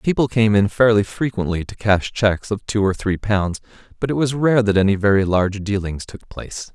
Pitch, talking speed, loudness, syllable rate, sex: 105 Hz, 215 wpm, -19 LUFS, 5.4 syllables/s, male